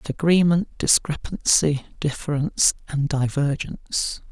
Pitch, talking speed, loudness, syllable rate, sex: 150 Hz, 70 wpm, -21 LUFS, 5.0 syllables/s, male